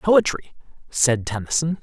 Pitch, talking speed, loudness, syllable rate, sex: 145 Hz, 100 wpm, -21 LUFS, 4.2 syllables/s, male